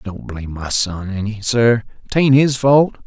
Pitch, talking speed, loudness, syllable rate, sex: 115 Hz, 155 wpm, -16 LUFS, 4.2 syllables/s, male